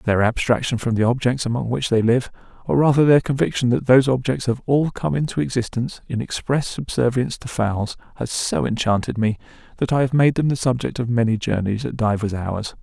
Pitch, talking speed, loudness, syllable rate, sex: 120 Hz, 200 wpm, -20 LUFS, 5.7 syllables/s, male